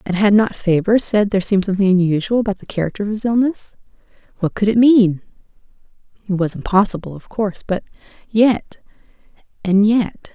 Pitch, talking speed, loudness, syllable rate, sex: 200 Hz, 140 wpm, -17 LUFS, 6.2 syllables/s, female